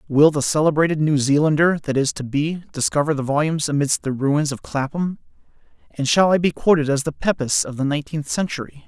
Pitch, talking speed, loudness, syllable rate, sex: 150 Hz, 195 wpm, -20 LUFS, 5.8 syllables/s, male